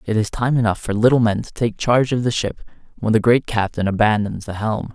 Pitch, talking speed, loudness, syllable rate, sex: 110 Hz, 245 wpm, -19 LUFS, 5.7 syllables/s, male